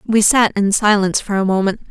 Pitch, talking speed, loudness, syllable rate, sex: 205 Hz, 220 wpm, -15 LUFS, 5.8 syllables/s, female